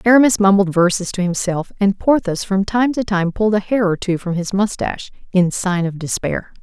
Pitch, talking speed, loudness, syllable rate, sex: 195 Hz, 210 wpm, -17 LUFS, 5.4 syllables/s, female